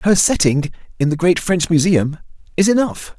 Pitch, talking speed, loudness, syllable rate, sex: 175 Hz, 170 wpm, -16 LUFS, 4.8 syllables/s, male